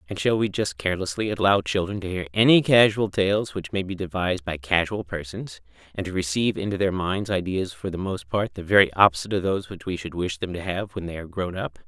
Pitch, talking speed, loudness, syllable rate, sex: 95 Hz, 235 wpm, -24 LUFS, 6.1 syllables/s, male